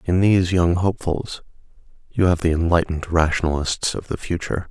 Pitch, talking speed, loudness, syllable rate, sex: 85 Hz, 155 wpm, -20 LUFS, 5.9 syllables/s, male